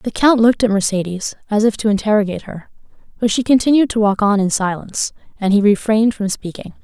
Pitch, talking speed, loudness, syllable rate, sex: 210 Hz, 200 wpm, -16 LUFS, 6.3 syllables/s, female